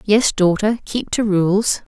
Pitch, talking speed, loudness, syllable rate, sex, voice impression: 205 Hz, 155 wpm, -18 LUFS, 3.6 syllables/s, female, feminine, young, soft, slightly fluent, cute, refreshing, friendly